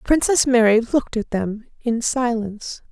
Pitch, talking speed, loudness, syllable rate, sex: 235 Hz, 145 wpm, -20 LUFS, 4.6 syllables/s, female